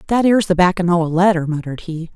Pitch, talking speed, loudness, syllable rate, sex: 175 Hz, 250 wpm, -16 LUFS, 7.3 syllables/s, female